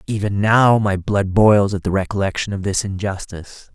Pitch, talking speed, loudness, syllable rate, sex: 100 Hz, 175 wpm, -17 LUFS, 5.0 syllables/s, male